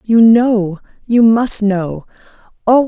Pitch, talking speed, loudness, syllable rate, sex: 220 Hz, 85 wpm, -13 LUFS, 3.0 syllables/s, female